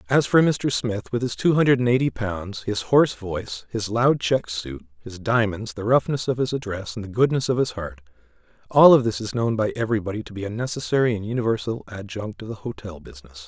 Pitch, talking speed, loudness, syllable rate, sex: 110 Hz, 215 wpm, -22 LUFS, 5.7 syllables/s, male